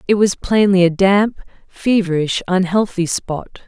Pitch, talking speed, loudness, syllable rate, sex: 190 Hz, 130 wpm, -16 LUFS, 4.0 syllables/s, female